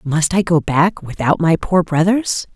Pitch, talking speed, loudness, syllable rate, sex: 170 Hz, 190 wpm, -16 LUFS, 4.2 syllables/s, female